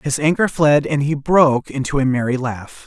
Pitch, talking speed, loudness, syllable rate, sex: 140 Hz, 210 wpm, -17 LUFS, 5.3 syllables/s, male